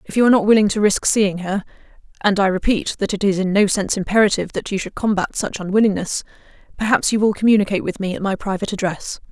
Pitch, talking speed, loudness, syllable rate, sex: 200 Hz, 225 wpm, -18 LUFS, 4.0 syllables/s, female